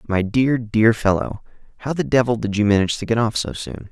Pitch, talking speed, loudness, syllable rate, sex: 115 Hz, 230 wpm, -19 LUFS, 5.7 syllables/s, male